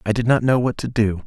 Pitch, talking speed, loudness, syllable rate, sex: 115 Hz, 330 wpm, -19 LUFS, 6.0 syllables/s, male